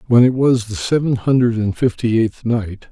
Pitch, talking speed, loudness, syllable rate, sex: 115 Hz, 205 wpm, -17 LUFS, 4.8 syllables/s, male